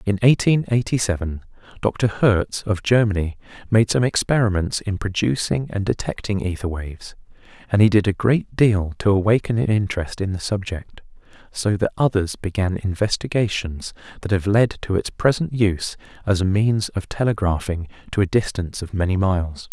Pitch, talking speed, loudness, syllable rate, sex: 100 Hz, 160 wpm, -21 LUFS, 5.1 syllables/s, male